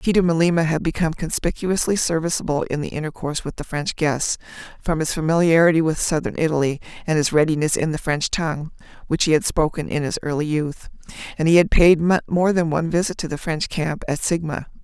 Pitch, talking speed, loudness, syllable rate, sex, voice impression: 160 Hz, 195 wpm, -21 LUFS, 6.0 syllables/s, female, slightly feminine, adult-like, fluent, calm, slightly unique